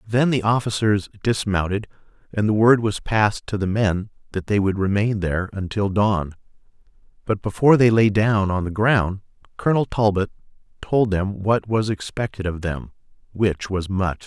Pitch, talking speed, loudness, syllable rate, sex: 105 Hz, 165 wpm, -21 LUFS, 4.9 syllables/s, male